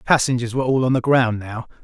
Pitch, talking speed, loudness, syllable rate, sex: 125 Hz, 260 wpm, -19 LUFS, 7.2 syllables/s, male